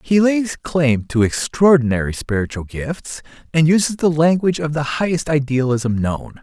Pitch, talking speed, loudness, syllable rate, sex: 145 Hz, 150 wpm, -18 LUFS, 4.7 syllables/s, male